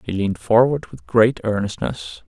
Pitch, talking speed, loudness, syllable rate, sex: 105 Hz, 155 wpm, -19 LUFS, 4.7 syllables/s, male